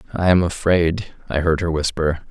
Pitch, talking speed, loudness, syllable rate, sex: 85 Hz, 180 wpm, -19 LUFS, 4.9 syllables/s, male